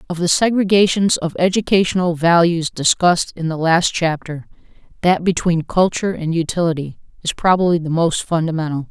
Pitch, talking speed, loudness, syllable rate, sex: 170 Hz, 140 wpm, -17 LUFS, 5.5 syllables/s, female